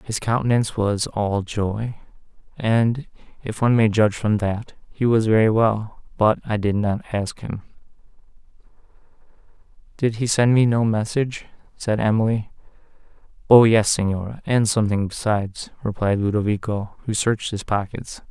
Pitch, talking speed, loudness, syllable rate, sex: 110 Hz, 140 wpm, -21 LUFS, 4.9 syllables/s, male